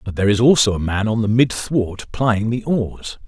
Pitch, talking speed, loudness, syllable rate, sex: 110 Hz, 240 wpm, -18 LUFS, 4.8 syllables/s, male